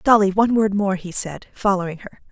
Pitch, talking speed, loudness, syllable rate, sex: 195 Hz, 205 wpm, -20 LUFS, 5.7 syllables/s, female